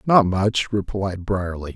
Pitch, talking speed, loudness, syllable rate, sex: 100 Hz, 135 wpm, -22 LUFS, 3.6 syllables/s, male